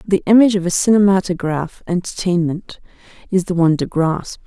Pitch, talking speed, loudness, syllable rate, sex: 180 Hz, 150 wpm, -16 LUFS, 5.6 syllables/s, female